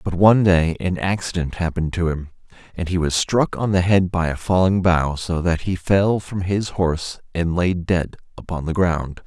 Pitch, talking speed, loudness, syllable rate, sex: 90 Hz, 205 wpm, -20 LUFS, 4.8 syllables/s, male